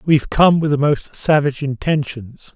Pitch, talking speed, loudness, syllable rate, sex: 145 Hz, 165 wpm, -17 LUFS, 4.9 syllables/s, male